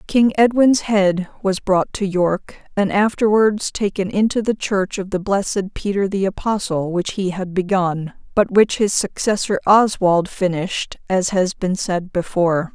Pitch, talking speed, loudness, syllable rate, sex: 195 Hz, 160 wpm, -18 LUFS, 4.3 syllables/s, female